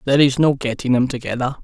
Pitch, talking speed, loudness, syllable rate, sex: 130 Hz, 220 wpm, -18 LUFS, 6.8 syllables/s, male